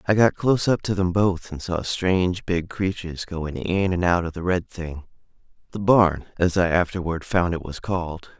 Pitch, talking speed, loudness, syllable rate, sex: 90 Hz, 200 wpm, -23 LUFS, 4.9 syllables/s, male